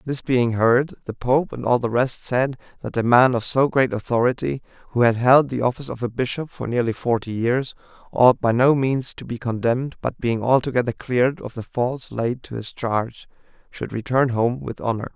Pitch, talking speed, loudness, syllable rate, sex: 125 Hz, 205 wpm, -21 LUFS, 5.1 syllables/s, male